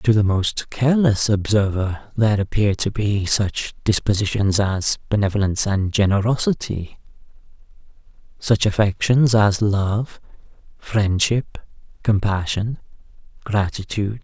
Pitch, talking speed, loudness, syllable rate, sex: 105 Hz, 95 wpm, -20 LUFS, 4.3 syllables/s, male